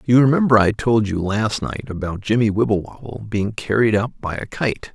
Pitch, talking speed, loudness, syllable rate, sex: 110 Hz, 195 wpm, -19 LUFS, 5.1 syllables/s, male